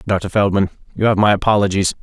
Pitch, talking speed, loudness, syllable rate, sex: 100 Hz, 180 wpm, -16 LUFS, 6.3 syllables/s, male